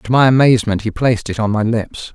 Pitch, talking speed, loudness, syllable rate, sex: 115 Hz, 250 wpm, -15 LUFS, 6.2 syllables/s, male